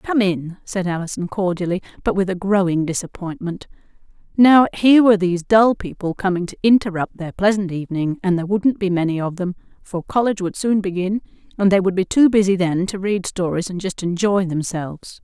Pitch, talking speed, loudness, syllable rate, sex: 190 Hz, 190 wpm, -19 LUFS, 5.6 syllables/s, female